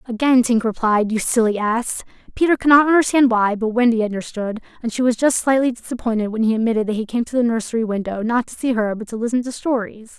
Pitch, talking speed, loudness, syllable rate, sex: 230 Hz, 230 wpm, -19 LUFS, 6.2 syllables/s, female